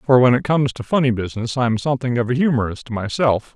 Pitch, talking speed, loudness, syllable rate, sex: 125 Hz, 220 wpm, -19 LUFS, 6.5 syllables/s, male